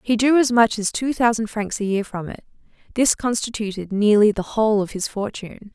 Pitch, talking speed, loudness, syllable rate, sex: 220 Hz, 210 wpm, -20 LUFS, 5.5 syllables/s, female